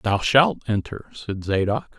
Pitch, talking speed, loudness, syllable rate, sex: 110 Hz, 150 wpm, -21 LUFS, 4.0 syllables/s, male